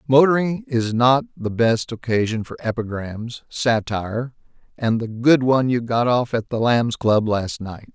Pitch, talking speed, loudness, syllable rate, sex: 120 Hz, 165 wpm, -20 LUFS, 4.4 syllables/s, male